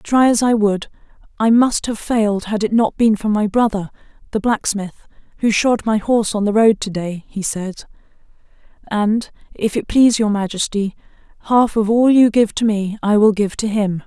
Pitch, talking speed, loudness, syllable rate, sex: 215 Hz, 195 wpm, -17 LUFS, 4.9 syllables/s, female